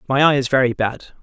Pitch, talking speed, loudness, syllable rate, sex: 130 Hz, 245 wpm, -18 LUFS, 6.0 syllables/s, male